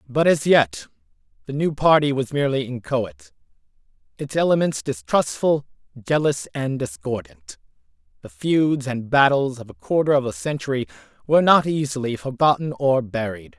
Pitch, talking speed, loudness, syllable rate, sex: 140 Hz, 135 wpm, -21 LUFS, 5.0 syllables/s, male